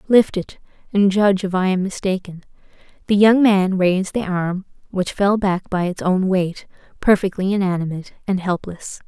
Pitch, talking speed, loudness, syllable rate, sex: 190 Hz, 165 wpm, -19 LUFS, 5.0 syllables/s, female